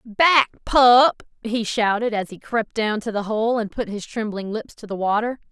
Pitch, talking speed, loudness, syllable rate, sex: 220 Hz, 205 wpm, -20 LUFS, 4.4 syllables/s, female